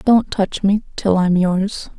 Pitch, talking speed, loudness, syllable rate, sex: 195 Hz, 180 wpm, -17 LUFS, 3.5 syllables/s, female